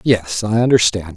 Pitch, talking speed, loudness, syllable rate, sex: 105 Hz, 155 wpm, -16 LUFS, 4.6 syllables/s, male